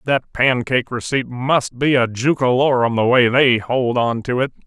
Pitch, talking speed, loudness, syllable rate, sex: 125 Hz, 180 wpm, -17 LUFS, 4.6 syllables/s, male